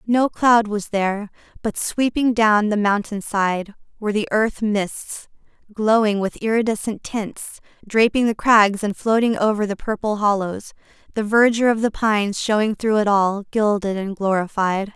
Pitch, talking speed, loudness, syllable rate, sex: 210 Hz, 155 wpm, -20 LUFS, 4.6 syllables/s, female